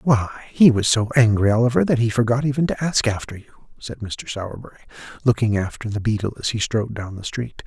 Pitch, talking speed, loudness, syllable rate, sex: 115 Hz, 210 wpm, -20 LUFS, 6.2 syllables/s, male